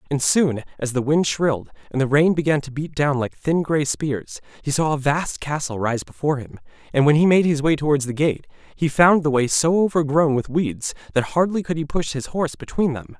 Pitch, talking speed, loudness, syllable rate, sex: 150 Hz, 230 wpm, -21 LUFS, 5.4 syllables/s, male